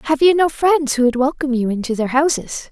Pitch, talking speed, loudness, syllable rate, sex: 275 Hz, 245 wpm, -17 LUFS, 5.9 syllables/s, female